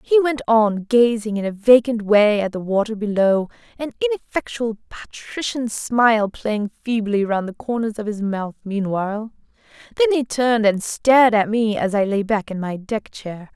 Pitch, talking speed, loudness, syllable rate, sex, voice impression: 220 Hz, 175 wpm, -19 LUFS, 4.7 syllables/s, female, very feminine, young, very thin, very tensed, powerful, very bright, hard, very clear, very fluent, slightly raspy, very cute, intellectual, very refreshing, sincere, slightly calm, friendly, slightly reassuring, very unique, elegant, slightly wild, slightly sweet, lively, strict, slightly intense, sharp